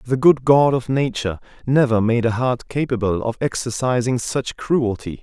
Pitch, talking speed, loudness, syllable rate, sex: 120 Hz, 160 wpm, -19 LUFS, 4.7 syllables/s, male